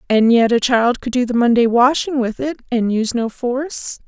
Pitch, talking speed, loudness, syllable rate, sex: 245 Hz, 220 wpm, -17 LUFS, 5.2 syllables/s, female